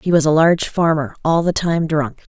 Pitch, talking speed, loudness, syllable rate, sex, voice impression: 160 Hz, 230 wpm, -17 LUFS, 5.1 syllables/s, female, feminine, adult-like, slightly tensed, slightly powerful, soft, clear, slightly raspy, intellectual, calm, friendly, elegant, slightly lively, kind, modest